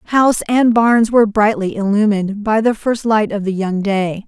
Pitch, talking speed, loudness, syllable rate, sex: 215 Hz, 195 wpm, -15 LUFS, 4.8 syllables/s, female